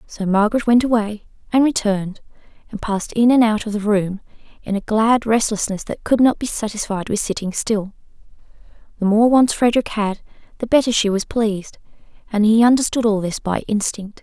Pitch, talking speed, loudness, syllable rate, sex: 215 Hz, 180 wpm, -18 LUFS, 5.5 syllables/s, female